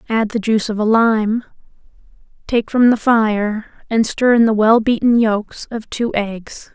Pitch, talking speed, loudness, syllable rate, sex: 220 Hz, 180 wpm, -16 LUFS, 4.1 syllables/s, female